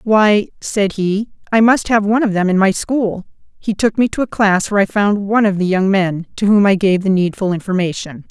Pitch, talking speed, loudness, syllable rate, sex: 200 Hz, 240 wpm, -15 LUFS, 5.4 syllables/s, female